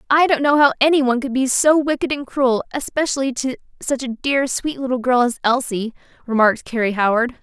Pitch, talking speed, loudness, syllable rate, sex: 260 Hz, 200 wpm, -18 LUFS, 5.7 syllables/s, female